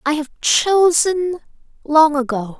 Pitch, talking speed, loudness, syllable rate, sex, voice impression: 305 Hz, 115 wpm, -16 LUFS, 3.4 syllables/s, female, very feminine, very young, tensed, very powerful, bright, very soft, very clear, very fluent, slightly raspy, very cute, intellectual, very refreshing, sincere, slightly calm, friendly, reassuring, very unique, slightly elegant, wild, slightly sweet, very lively, strict, intense, sharp, very light